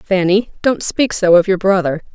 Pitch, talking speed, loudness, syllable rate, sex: 190 Hz, 195 wpm, -15 LUFS, 4.7 syllables/s, female